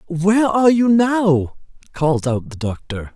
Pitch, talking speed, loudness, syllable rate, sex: 175 Hz, 150 wpm, -17 LUFS, 4.5 syllables/s, male